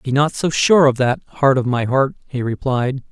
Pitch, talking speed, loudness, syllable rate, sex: 135 Hz, 230 wpm, -17 LUFS, 4.5 syllables/s, male